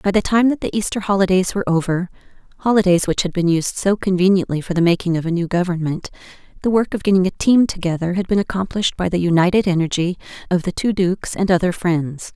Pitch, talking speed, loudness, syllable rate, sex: 185 Hz, 205 wpm, -18 LUFS, 6.4 syllables/s, female